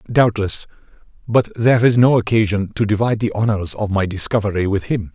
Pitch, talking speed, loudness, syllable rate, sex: 105 Hz, 175 wpm, -17 LUFS, 5.8 syllables/s, male